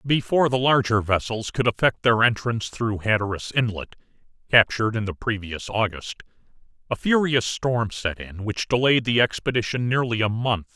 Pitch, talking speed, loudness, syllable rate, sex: 115 Hz, 155 wpm, -22 LUFS, 5.1 syllables/s, male